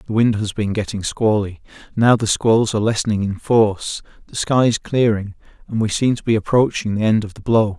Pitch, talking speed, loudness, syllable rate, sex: 110 Hz, 215 wpm, -18 LUFS, 5.5 syllables/s, male